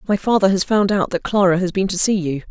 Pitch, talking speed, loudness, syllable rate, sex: 190 Hz, 285 wpm, -17 LUFS, 6.1 syllables/s, female